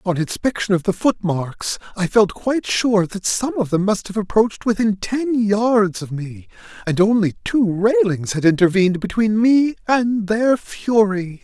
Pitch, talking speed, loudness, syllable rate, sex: 205 Hz, 170 wpm, -18 LUFS, 4.4 syllables/s, male